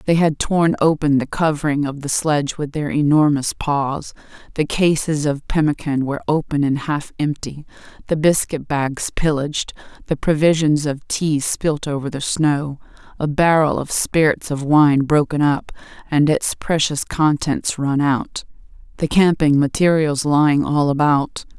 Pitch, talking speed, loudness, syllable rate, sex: 150 Hz, 150 wpm, -18 LUFS, 4.4 syllables/s, female